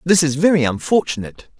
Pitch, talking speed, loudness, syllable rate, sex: 155 Hz, 150 wpm, -17 LUFS, 6.3 syllables/s, male